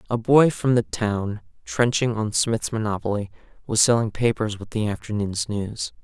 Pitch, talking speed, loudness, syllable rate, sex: 110 Hz, 160 wpm, -22 LUFS, 4.6 syllables/s, male